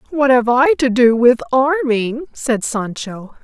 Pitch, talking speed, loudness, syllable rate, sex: 250 Hz, 155 wpm, -15 LUFS, 3.7 syllables/s, female